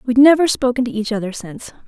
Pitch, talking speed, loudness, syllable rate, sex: 240 Hz, 225 wpm, -16 LUFS, 7.2 syllables/s, female